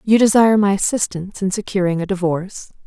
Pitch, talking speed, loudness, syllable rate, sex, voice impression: 195 Hz, 170 wpm, -17 LUFS, 6.4 syllables/s, female, feminine, adult-like, bright, clear, fluent, intellectual, friendly, reassuring, elegant, kind, slightly modest